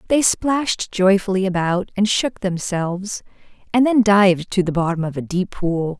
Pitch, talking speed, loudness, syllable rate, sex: 195 Hz, 170 wpm, -19 LUFS, 4.8 syllables/s, female